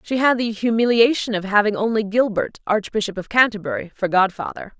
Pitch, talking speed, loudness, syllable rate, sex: 215 Hz, 165 wpm, -19 LUFS, 5.7 syllables/s, female